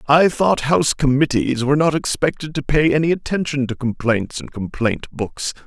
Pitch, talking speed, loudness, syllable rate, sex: 140 Hz, 170 wpm, -19 LUFS, 5.1 syllables/s, male